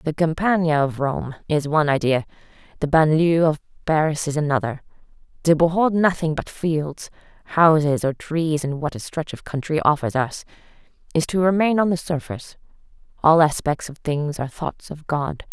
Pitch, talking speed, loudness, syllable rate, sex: 155 Hz, 165 wpm, -21 LUFS, 4.9 syllables/s, female